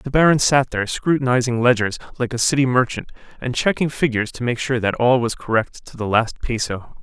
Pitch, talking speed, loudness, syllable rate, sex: 125 Hz, 205 wpm, -19 LUFS, 5.7 syllables/s, male